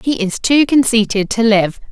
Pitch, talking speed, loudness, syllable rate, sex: 225 Hz, 190 wpm, -14 LUFS, 4.6 syllables/s, female